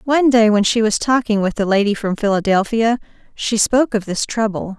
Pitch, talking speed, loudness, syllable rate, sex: 220 Hz, 200 wpm, -17 LUFS, 5.5 syllables/s, female